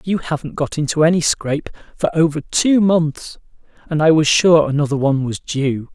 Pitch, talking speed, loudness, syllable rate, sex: 155 Hz, 180 wpm, -17 LUFS, 5.1 syllables/s, male